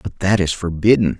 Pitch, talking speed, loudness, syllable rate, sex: 90 Hz, 200 wpm, -17 LUFS, 5.2 syllables/s, male